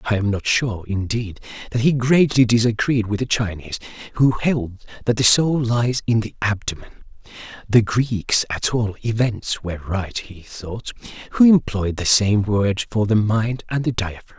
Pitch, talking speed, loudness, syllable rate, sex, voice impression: 110 Hz, 170 wpm, -20 LUFS, 4.5 syllables/s, male, very masculine, slightly young, slightly thick, slightly relaxed, powerful, slightly dark, soft, slightly muffled, fluent, cool, intellectual, slightly refreshing, slightly sincere, slightly calm, slightly friendly, slightly reassuring, unique, slightly elegant, wild, slightly sweet, lively, slightly strict, slightly intense, slightly modest